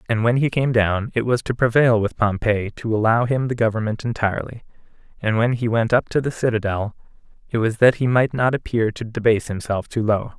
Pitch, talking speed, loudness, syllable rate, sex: 115 Hz, 215 wpm, -20 LUFS, 5.7 syllables/s, male